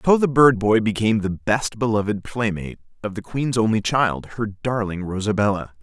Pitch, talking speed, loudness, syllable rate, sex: 110 Hz, 175 wpm, -21 LUFS, 5.2 syllables/s, male